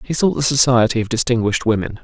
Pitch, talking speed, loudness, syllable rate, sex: 120 Hz, 205 wpm, -16 LUFS, 6.7 syllables/s, male